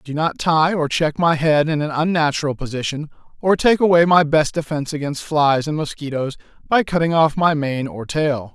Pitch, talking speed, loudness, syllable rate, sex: 155 Hz, 195 wpm, -18 LUFS, 5.1 syllables/s, male